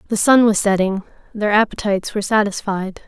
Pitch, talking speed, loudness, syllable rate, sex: 205 Hz, 155 wpm, -17 LUFS, 5.9 syllables/s, female